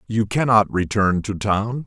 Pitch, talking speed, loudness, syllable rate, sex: 105 Hz, 160 wpm, -20 LUFS, 4.1 syllables/s, male